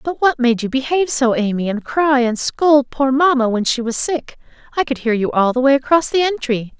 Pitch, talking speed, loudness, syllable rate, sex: 260 Hz, 240 wpm, -17 LUFS, 5.3 syllables/s, female